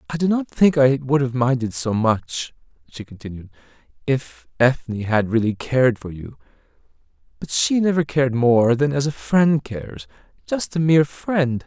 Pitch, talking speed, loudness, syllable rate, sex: 130 Hz, 170 wpm, -19 LUFS, 4.7 syllables/s, male